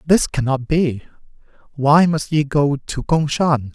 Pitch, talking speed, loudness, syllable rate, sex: 145 Hz, 160 wpm, -18 LUFS, 3.8 syllables/s, male